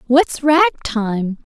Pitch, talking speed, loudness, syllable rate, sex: 240 Hz, 115 wpm, -17 LUFS, 2.9 syllables/s, female